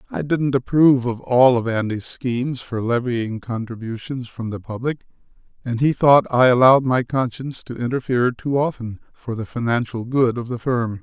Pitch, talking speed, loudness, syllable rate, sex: 125 Hz, 175 wpm, -20 LUFS, 5.1 syllables/s, male